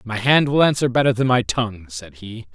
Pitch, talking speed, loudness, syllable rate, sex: 120 Hz, 235 wpm, -18 LUFS, 5.5 syllables/s, male